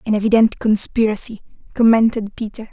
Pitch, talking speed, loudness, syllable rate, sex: 220 Hz, 110 wpm, -17 LUFS, 5.8 syllables/s, female